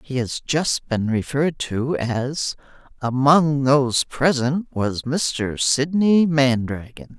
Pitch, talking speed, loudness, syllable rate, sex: 140 Hz, 115 wpm, -20 LUFS, 3.3 syllables/s, female